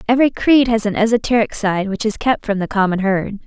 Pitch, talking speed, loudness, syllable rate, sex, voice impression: 215 Hz, 225 wpm, -17 LUFS, 5.8 syllables/s, female, feminine, slightly adult-like, slightly clear, slightly fluent, slightly cute, slightly refreshing, friendly, kind